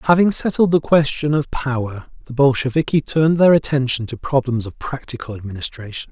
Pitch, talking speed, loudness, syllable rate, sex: 135 Hz, 155 wpm, -18 LUFS, 5.7 syllables/s, male